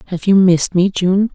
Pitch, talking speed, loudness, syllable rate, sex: 185 Hz, 220 wpm, -14 LUFS, 5.4 syllables/s, female